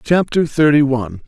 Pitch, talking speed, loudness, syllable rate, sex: 140 Hz, 140 wpm, -15 LUFS, 5.2 syllables/s, male